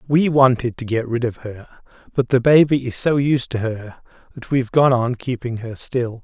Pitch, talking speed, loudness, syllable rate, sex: 125 Hz, 210 wpm, -19 LUFS, 4.9 syllables/s, male